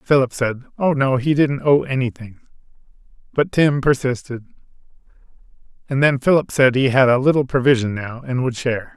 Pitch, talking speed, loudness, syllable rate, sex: 130 Hz, 160 wpm, -18 LUFS, 5.4 syllables/s, male